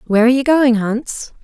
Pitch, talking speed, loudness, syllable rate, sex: 240 Hz, 210 wpm, -14 LUFS, 5.8 syllables/s, female